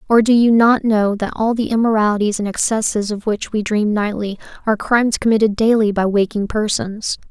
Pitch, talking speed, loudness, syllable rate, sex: 215 Hz, 190 wpm, -17 LUFS, 5.5 syllables/s, female